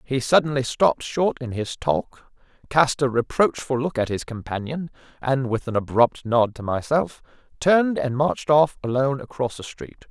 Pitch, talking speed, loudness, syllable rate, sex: 130 Hz, 170 wpm, -22 LUFS, 5.0 syllables/s, male